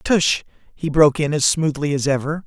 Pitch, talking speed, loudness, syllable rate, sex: 150 Hz, 195 wpm, -19 LUFS, 5.3 syllables/s, male